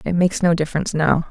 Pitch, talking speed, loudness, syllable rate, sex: 170 Hz, 230 wpm, -19 LUFS, 7.5 syllables/s, female